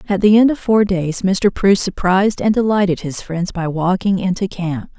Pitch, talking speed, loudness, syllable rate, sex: 190 Hz, 205 wpm, -16 LUFS, 4.8 syllables/s, female